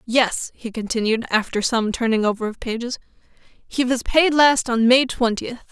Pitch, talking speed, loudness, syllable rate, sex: 235 Hz, 170 wpm, -20 LUFS, 4.6 syllables/s, female